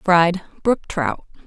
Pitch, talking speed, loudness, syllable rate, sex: 180 Hz, 125 wpm, -20 LUFS, 3.3 syllables/s, female